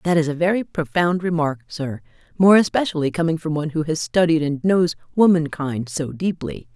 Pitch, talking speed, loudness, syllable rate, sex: 160 Hz, 170 wpm, -20 LUFS, 5.5 syllables/s, female